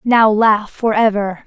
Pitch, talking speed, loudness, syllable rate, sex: 215 Hz, 165 wpm, -14 LUFS, 3.7 syllables/s, female